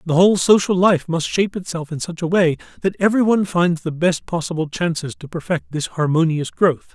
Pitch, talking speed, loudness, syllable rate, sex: 170 Hz, 200 wpm, -19 LUFS, 5.5 syllables/s, male